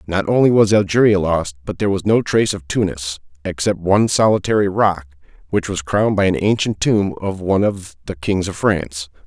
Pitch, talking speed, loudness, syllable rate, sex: 95 Hz, 195 wpm, -17 LUFS, 5.6 syllables/s, male